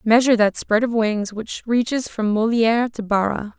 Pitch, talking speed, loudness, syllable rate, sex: 225 Hz, 185 wpm, -20 LUFS, 4.9 syllables/s, female